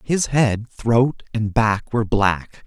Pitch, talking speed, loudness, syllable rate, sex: 115 Hz, 160 wpm, -20 LUFS, 3.2 syllables/s, male